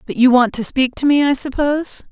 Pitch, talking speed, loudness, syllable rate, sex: 265 Hz, 255 wpm, -16 LUFS, 5.6 syllables/s, female